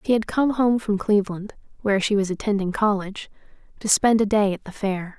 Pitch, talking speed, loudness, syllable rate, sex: 205 Hz, 210 wpm, -22 LUFS, 5.8 syllables/s, female